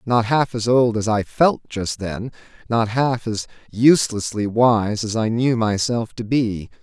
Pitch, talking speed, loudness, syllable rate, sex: 115 Hz, 175 wpm, -20 LUFS, 4.1 syllables/s, male